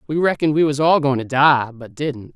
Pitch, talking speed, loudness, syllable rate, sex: 140 Hz, 255 wpm, -18 LUFS, 5.4 syllables/s, male